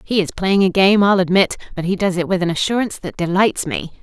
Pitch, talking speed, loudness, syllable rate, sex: 190 Hz, 255 wpm, -17 LUFS, 6.0 syllables/s, female